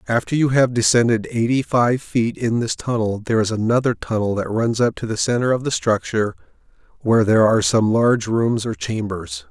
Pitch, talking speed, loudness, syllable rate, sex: 115 Hz, 195 wpm, -19 LUFS, 5.6 syllables/s, male